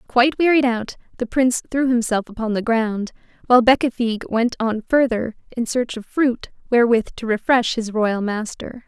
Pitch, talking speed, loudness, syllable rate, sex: 235 Hz, 170 wpm, -19 LUFS, 5.2 syllables/s, female